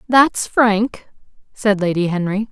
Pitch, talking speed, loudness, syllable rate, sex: 210 Hz, 120 wpm, -17 LUFS, 3.7 syllables/s, female